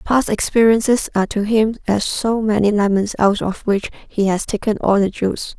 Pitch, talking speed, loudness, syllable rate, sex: 210 Hz, 195 wpm, -17 LUFS, 5.1 syllables/s, female